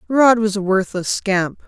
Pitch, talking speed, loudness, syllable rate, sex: 205 Hz, 180 wpm, -17 LUFS, 4.1 syllables/s, female